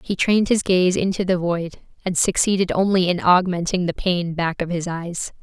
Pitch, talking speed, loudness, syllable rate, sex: 180 Hz, 200 wpm, -20 LUFS, 5.0 syllables/s, female